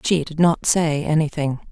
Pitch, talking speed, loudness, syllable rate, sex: 155 Hz, 175 wpm, -19 LUFS, 4.6 syllables/s, female